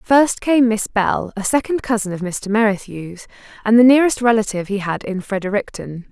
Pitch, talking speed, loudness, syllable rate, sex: 215 Hz, 175 wpm, -17 LUFS, 5.3 syllables/s, female